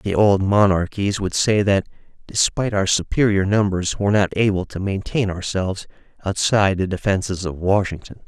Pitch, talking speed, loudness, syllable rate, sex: 100 Hz, 150 wpm, -20 LUFS, 5.3 syllables/s, male